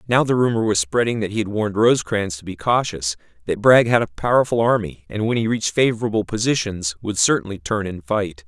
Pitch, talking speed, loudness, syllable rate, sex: 105 Hz, 210 wpm, -20 LUFS, 6.0 syllables/s, male